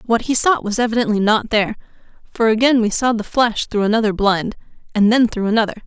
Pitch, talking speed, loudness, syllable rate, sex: 220 Hz, 205 wpm, -17 LUFS, 6.2 syllables/s, female